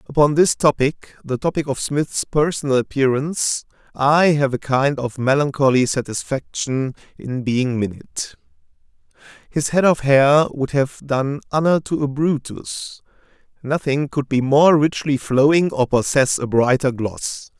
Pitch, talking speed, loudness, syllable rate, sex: 135 Hz, 130 wpm, -19 LUFS, 4.3 syllables/s, male